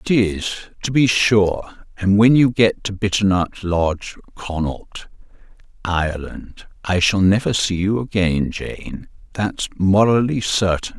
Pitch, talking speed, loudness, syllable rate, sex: 100 Hz, 130 wpm, -18 LUFS, 3.9 syllables/s, male